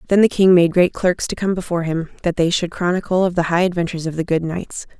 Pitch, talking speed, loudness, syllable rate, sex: 175 Hz, 265 wpm, -18 LUFS, 6.4 syllables/s, female